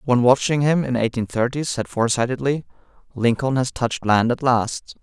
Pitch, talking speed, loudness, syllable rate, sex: 125 Hz, 165 wpm, -20 LUFS, 5.4 syllables/s, male